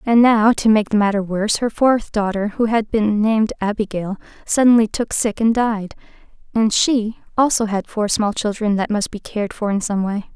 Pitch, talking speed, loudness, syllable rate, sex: 215 Hz, 205 wpm, -18 LUFS, 5.0 syllables/s, female